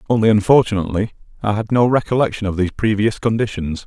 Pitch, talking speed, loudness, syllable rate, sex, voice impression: 105 Hz, 155 wpm, -18 LUFS, 6.8 syllables/s, male, masculine, adult-like, slightly thick, cool, slightly intellectual, calm